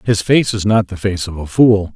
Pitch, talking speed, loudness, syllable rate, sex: 100 Hz, 275 wpm, -15 LUFS, 4.9 syllables/s, male